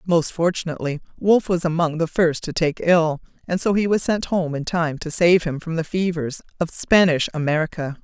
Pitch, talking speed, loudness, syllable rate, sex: 165 Hz, 200 wpm, -21 LUFS, 5.2 syllables/s, female